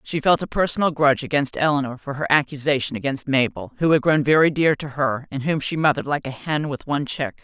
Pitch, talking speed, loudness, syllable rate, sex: 140 Hz, 235 wpm, -21 LUFS, 6.3 syllables/s, female